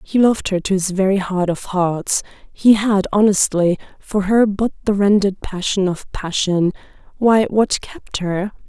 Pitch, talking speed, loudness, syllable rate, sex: 195 Hz, 160 wpm, -18 LUFS, 4.4 syllables/s, female